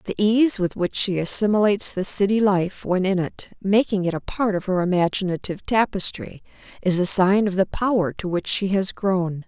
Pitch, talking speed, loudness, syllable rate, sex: 190 Hz, 195 wpm, -21 LUFS, 5.1 syllables/s, female